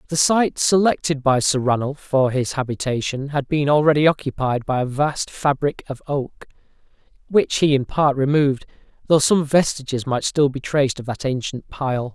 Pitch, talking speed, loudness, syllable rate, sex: 140 Hz, 175 wpm, -20 LUFS, 4.9 syllables/s, male